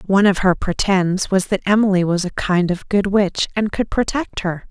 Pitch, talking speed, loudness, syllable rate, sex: 190 Hz, 215 wpm, -18 LUFS, 4.8 syllables/s, female